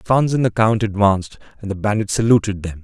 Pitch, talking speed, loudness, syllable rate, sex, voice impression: 105 Hz, 210 wpm, -18 LUFS, 6.0 syllables/s, male, masculine, adult-like, slightly thick, tensed, powerful, slightly soft, slightly raspy, cool, intellectual, calm, friendly, reassuring, wild, lively, kind